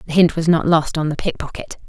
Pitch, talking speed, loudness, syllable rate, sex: 160 Hz, 285 wpm, -17 LUFS, 6.2 syllables/s, female